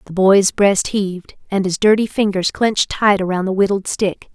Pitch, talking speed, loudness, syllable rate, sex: 195 Hz, 195 wpm, -16 LUFS, 4.9 syllables/s, female